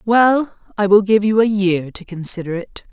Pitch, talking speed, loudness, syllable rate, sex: 200 Hz, 205 wpm, -16 LUFS, 4.6 syllables/s, female